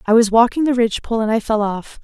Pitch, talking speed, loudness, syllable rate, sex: 225 Hz, 265 wpm, -17 LUFS, 6.8 syllables/s, female